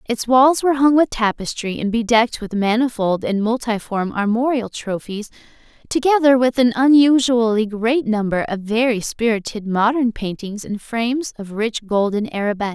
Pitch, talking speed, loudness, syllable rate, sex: 230 Hz, 145 wpm, -18 LUFS, 5.0 syllables/s, female